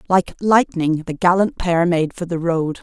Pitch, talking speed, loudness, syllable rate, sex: 175 Hz, 190 wpm, -18 LUFS, 4.3 syllables/s, female